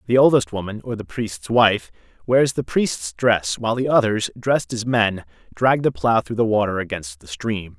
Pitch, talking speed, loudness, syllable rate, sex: 110 Hz, 200 wpm, -20 LUFS, 4.8 syllables/s, male